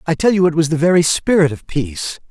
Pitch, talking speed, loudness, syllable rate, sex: 160 Hz, 260 wpm, -16 LUFS, 6.3 syllables/s, male